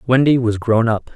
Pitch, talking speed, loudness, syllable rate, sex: 120 Hz, 210 wpm, -16 LUFS, 5.0 syllables/s, male